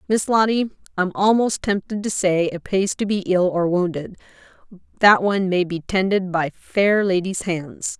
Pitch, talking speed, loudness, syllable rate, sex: 190 Hz, 175 wpm, -20 LUFS, 4.6 syllables/s, female